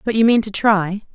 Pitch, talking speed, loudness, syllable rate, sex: 210 Hz, 260 wpm, -17 LUFS, 5.1 syllables/s, female